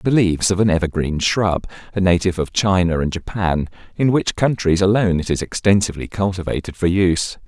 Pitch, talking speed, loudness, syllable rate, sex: 95 Hz, 175 wpm, -18 LUFS, 5.9 syllables/s, male